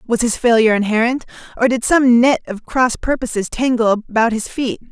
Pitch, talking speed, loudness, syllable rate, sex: 235 Hz, 185 wpm, -16 LUFS, 5.3 syllables/s, female